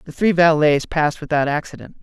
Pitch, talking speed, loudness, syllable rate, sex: 155 Hz, 180 wpm, -18 LUFS, 5.9 syllables/s, male